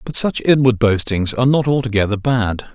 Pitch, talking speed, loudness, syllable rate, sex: 120 Hz, 175 wpm, -16 LUFS, 5.4 syllables/s, male